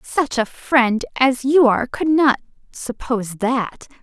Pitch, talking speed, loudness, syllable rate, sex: 250 Hz, 150 wpm, -18 LUFS, 3.8 syllables/s, female